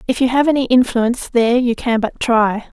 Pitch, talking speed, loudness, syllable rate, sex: 240 Hz, 215 wpm, -16 LUFS, 5.5 syllables/s, female